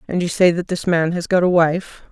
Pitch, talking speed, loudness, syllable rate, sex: 175 Hz, 285 wpm, -18 LUFS, 5.3 syllables/s, female